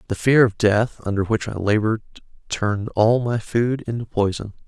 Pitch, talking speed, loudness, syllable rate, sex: 110 Hz, 180 wpm, -21 LUFS, 5.2 syllables/s, male